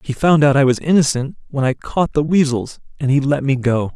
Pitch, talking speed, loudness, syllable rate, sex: 140 Hz, 245 wpm, -17 LUFS, 5.3 syllables/s, male